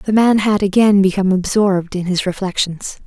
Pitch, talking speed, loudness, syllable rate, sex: 195 Hz, 175 wpm, -15 LUFS, 5.4 syllables/s, female